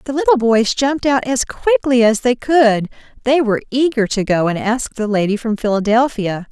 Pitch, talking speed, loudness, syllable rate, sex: 235 Hz, 195 wpm, -16 LUFS, 5.1 syllables/s, female